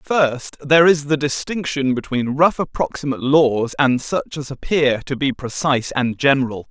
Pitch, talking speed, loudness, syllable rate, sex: 140 Hz, 160 wpm, -18 LUFS, 4.8 syllables/s, male